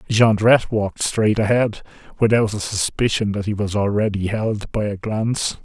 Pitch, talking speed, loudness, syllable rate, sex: 105 Hz, 160 wpm, -19 LUFS, 5.1 syllables/s, male